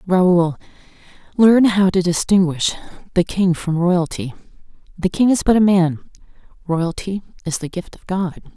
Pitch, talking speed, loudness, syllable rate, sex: 180 Hz, 145 wpm, -18 LUFS, 4.4 syllables/s, female